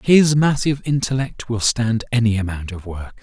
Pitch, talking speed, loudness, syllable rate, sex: 120 Hz, 165 wpm, -19 LUFS, 5.0 syllables/s, male